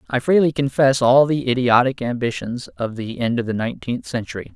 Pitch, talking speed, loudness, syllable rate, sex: 125 Hz, 185 wpm, -19 LUFS, 5.5 syllables/s, male